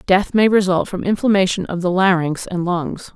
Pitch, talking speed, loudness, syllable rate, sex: 185 Hz, 190 wpm, -17 LUFS, 5.0 syllables/s, female